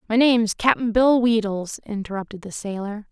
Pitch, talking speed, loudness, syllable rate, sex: 220 Hz, 155 wpm, -21 LUFS, 4.9 syllables/s, female